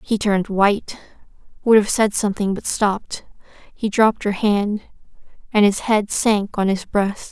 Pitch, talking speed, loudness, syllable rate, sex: 205 Hz, 165 wpm, -19 LUFS, 4.7 syllables/s, female